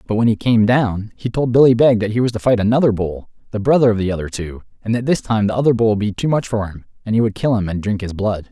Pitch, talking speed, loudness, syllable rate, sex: 110 Hz, 305 wpm, -17 LUFS, 6.4 syllables/s, male